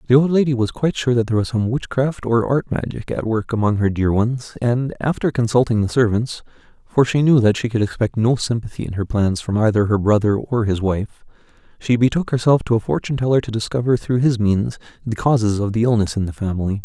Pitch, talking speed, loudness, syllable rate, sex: 115 Hz, 230 wpm, -19 LUFS, 4.6 syllables/s, male